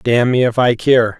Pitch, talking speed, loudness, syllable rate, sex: 120 Hz, 250 wpm, -14 LUFS, 4.6 syllables/s, male